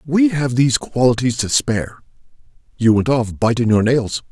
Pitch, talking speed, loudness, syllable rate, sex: 125 Hz, 165 wpm, -17 LUFS, 5.0 syllables/s, male